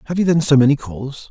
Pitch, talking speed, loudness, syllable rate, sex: 140 Hz, 275 wpm, -15 LUFS, 6.3 syllables/s, male